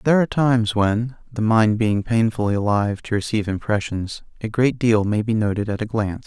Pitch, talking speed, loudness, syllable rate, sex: 110 Hz, 200 wpm, -20 LUFS, 5.8 syllables/s, male